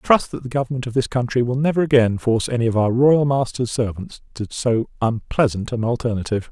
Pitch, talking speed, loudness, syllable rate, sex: 120 Hz, 210 wpm, -20 LUFS, 6.2 syllables/s, male